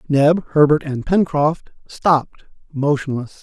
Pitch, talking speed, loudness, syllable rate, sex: 150 Hz, 105 wpm, -17 LUFS, 3.9 syllables/s, male